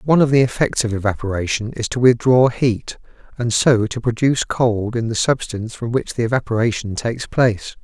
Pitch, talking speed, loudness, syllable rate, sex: 115 Hz, 185 wpm, -18 LUFS, 5.6 syllables/s, male